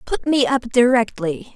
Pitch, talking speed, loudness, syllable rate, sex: 245 Hz, 155 wpm, -18 LUFS, 4.2 syllables/s, female